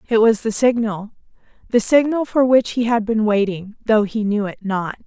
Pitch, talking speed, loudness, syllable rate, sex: 220 Hz, 200 wpm, -18 LUFS, 4.8 syllables/s, female